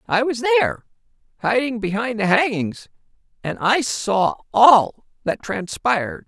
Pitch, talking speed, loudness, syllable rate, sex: 200 Hz, 125 wpm, -19 LUFS, 4.2 syllables/s, male